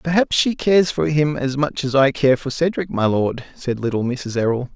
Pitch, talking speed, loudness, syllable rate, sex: 140 Hz, 225 wpm, -19 LUFS, 5.1 syllables/s, male